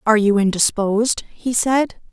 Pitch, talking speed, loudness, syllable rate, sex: 220 Hz, 140 wpm, -18 LUFS, 4.8 syllables/s, female